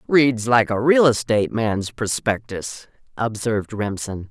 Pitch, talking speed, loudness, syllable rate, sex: 115 Hz, 110 wpm, -20 LUFS, 4.1 syllables/s, female